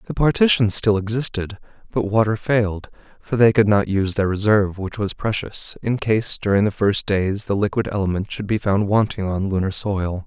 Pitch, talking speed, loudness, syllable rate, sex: 105 Hz, 195 wpm, -20 LUFS, 5.2 syllables/s, male